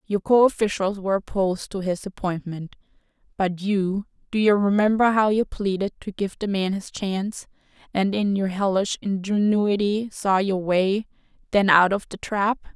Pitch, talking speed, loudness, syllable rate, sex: 200 Hz, 160 wpm, -23 LUFS, 4.7 syllables/s, female